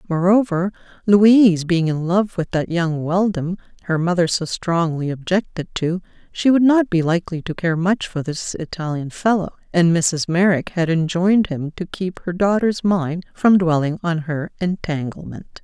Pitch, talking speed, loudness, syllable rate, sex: 175 Hz, 165 wpm, -19 LUFS, 4.6 syllables/s, female